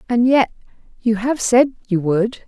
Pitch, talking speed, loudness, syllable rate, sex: 230 Hz, 170 wpm, -18 LUFS, 4.1 syllables/s, female